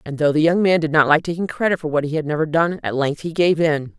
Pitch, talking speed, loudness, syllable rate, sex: 160 Hz, 315 wpm, -19 LUFS, 6.2 syllables/s, female